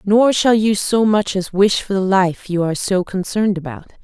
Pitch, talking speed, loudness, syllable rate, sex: 195 Hz, 225 wpm, -17 LUFS, 5.0 syllables/s, female